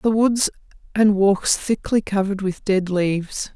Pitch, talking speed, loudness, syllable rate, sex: 200 Hz, 150 wpm, -20 LUFS, 4.3 syllables/s, female